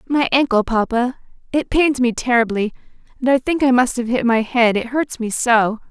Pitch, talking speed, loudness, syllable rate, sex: 245 Hz, 205 wpm, -17 LUFS, 4.9 syllables/s, female